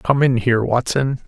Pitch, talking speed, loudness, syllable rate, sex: 125 Hz, 190 wpm, -18 LUFS, 5.0 syllables/s, male